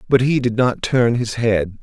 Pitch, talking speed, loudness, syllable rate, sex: 120 Hz, 230 wpm, -18 LUFS, 4.3 syllables/s, male